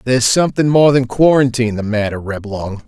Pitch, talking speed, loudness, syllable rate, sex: 120 Hz, 165 wpm, -14 LUFS, 5.8 syllables/s, male